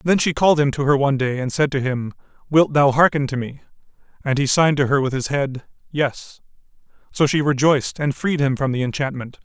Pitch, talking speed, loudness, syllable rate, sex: 140 Hz, 220 wpm, -19 LUFS, 5.8 syllables/s, male